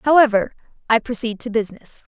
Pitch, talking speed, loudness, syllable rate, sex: 230 Hz, 140 wpm, -19 LUFS, 5.9 syllables/s, female